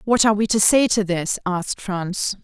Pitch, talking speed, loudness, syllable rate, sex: 200 Hz, 220 wpm, -19 LUFS, 5.0 syllables/s, female